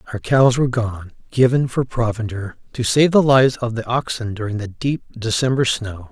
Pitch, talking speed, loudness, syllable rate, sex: 120 Hz, 175 wpm, -19 LUFS, 5.2 syllables/s, male